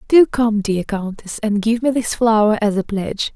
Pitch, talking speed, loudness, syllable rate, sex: 220 Hz, 215 wpm, -18 LUFS, 4.8 syllables/s, female